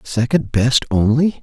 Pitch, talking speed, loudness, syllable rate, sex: 130 Hz, 125 wpm, -16 LUFS, 3.9 syllables/s, male